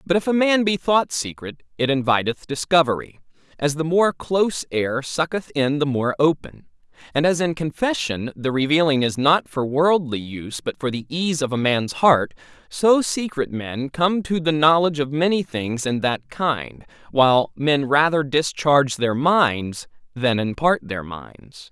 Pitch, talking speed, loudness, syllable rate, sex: 145 Hz, 170 wpm, -20 LUFS, 4.4 syllables/s, male